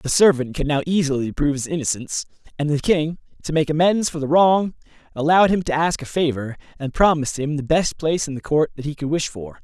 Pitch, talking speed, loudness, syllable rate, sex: 150 Hz, 230 wpm, -20 LUFS, 6.1 syllables/s, male